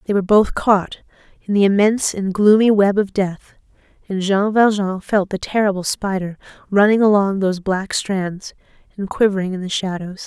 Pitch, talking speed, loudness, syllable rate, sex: 195 Hz, 170 wpm, -17 LUFS, 5.1 syllables/s, female